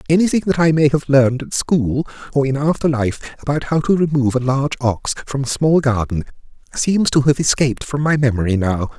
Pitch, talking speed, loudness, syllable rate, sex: 140 Hz, 205 wpm, -17 LUFS, 5.8 syllables/s, male